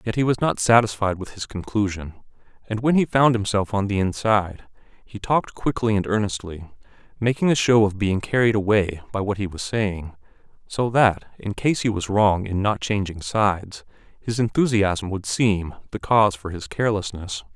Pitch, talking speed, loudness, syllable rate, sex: 105 Hz, 180 wpm, -22 LUFS, 5.0 syllables/s, male